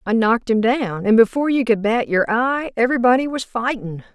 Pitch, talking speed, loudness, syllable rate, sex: 235 Hz, 205 wpm, -18 LUFS, 5.7 syllables/s, female